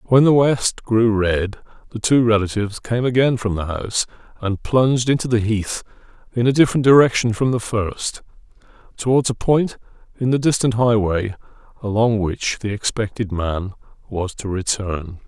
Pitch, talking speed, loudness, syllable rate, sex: 110 Hz, 155 wpm, -19 LUFS, 4.9 syllables/s, male